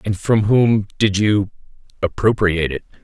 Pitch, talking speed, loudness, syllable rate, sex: 100 Hz, 140 wpm, -17 LUFS, 4.7 syllables/s, male